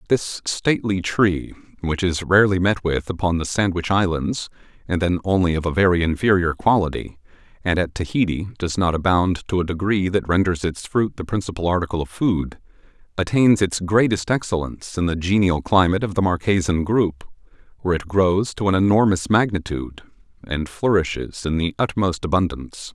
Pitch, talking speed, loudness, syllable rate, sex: 90 Hz, 165 wpm, -20 LUFS, 5.4 syllables/s, male